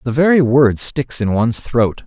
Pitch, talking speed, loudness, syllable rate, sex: 125 Hz, 205 wpm, -15 LUFS, 4.6 syllables/s, male